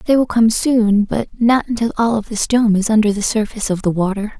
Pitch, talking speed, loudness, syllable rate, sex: 220 Hz, 245 wpm, -16 LUFS, 5.5 syllables/s, female